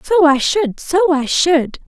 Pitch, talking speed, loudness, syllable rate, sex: 315 Hz, 185 wpm, -15 LUFS, 3.5 syllables/s, female